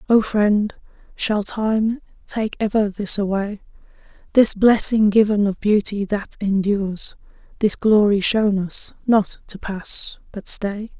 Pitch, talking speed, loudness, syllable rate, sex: 205 Hz, 130 wpm, -20 LUFS, 3.7 syllables/s, female